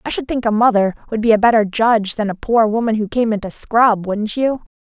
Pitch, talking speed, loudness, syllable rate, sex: 220 Hz, 260 wpm, -16 LUFS, 5.6 syllables/s, female